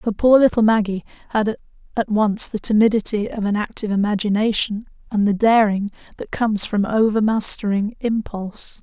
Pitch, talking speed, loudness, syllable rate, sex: 215 Hz, 145 wpm, -19 LUFS, 5.4 syllables/s, female